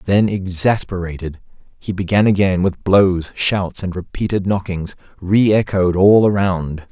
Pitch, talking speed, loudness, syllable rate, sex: 95 Hz, 130 wpm, -17 LUFS, 4.2 syllables/s, male